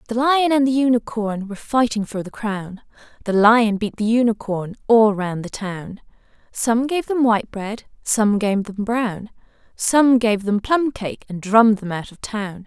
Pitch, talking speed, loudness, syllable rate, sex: 220 Hz, 185 wpm, -19 LUFS, 4.4 syllables/s, female